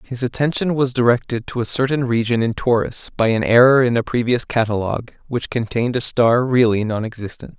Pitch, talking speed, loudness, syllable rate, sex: 120 Hz, 180 wpm, -18 LUFS, 5.6 syllables/s, male